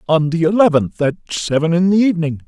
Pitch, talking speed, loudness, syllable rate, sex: 165 Hz, 195 wpm, -16 LUFS, 6.1 syllables/s, male